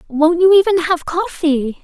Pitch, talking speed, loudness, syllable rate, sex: 335 Hz, 165 wpm, -14 LUFS, 4.3 syllables/s, female